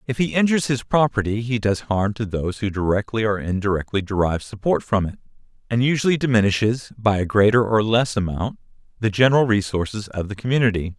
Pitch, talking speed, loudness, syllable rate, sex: 110 Hz, 180 wpm, -21 LUFS, 6.1 syllables/s, male